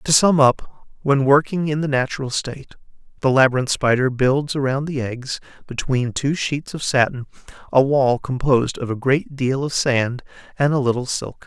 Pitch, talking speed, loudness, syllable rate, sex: 135 Hz, 180 wpm, -19 LUFS, 4.9 syllables/s, male